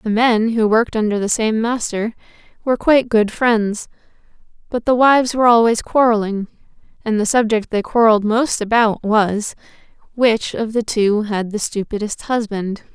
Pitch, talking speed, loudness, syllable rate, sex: 220 Hz, 155 wpm, -17 LUFS, 4.9 syllables/s, female